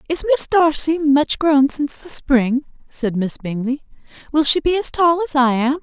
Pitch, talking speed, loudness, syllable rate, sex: 285 Hz, 195 wpm, -18 LUFS, 5.0 syllables/s, female